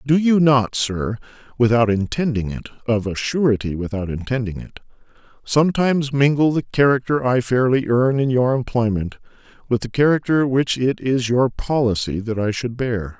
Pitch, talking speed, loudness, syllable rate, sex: 125 Hz, 145 wpm, -19 LUFS, 5.0 syllables/s, male